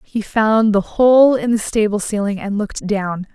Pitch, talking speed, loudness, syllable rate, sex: 210 Hz, 195 wpm, -16 LUFS, 4.4 syllables/s, female